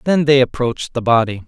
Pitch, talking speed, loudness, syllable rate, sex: 130 Hz, 205 wpm, -16 LUFS, 5.9 syllables/s, male